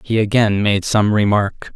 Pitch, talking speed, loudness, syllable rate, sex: 105 Hz, 170 wpm, -16 LUFS, 4.2 syllables/s, male